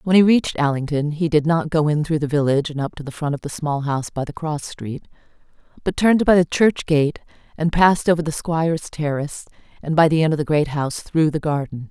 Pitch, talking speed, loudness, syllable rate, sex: 155 Hz, 240 wpm, -20 LUFS, 6.0 syllables/s, female